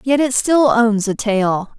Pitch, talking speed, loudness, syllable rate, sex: 230 Hz, 200 wpm, -15 LUFS, 3.7 syllables/s, female